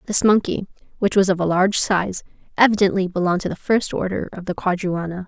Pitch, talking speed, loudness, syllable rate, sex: 190 Hz, 195 wpm, -20 LUFS, 6.4 syllables/s, female